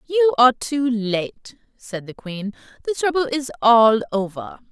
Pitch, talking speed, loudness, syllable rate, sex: 240 Hz, 155 wpm, -19 LUFS, 4.2 syllables/s, female